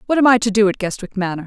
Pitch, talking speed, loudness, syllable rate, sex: 210 Hz, 325 wpm, -17 LUFS, 7.6 syllables/s, female